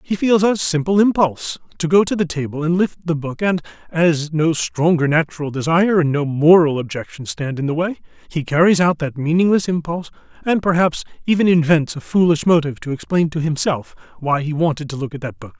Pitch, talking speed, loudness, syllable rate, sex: 160 Hz, 205 wpm, -18 LUFS, 5.7 syllables/s, male